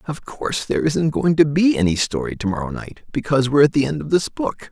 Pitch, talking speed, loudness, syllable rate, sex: 145 Hz, 255 wpm, -19 LUFS, 6.3 syllables/s, male